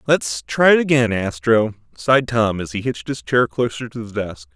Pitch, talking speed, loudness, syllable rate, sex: 115 Hz, 200 wpm, -19 LUFS, 4.9 syllables/s, male